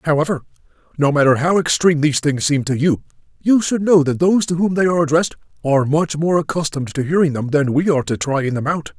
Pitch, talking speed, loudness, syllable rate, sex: 155 Hz, 225 wpm, -17 LUFS, 6.5 syllables/s, male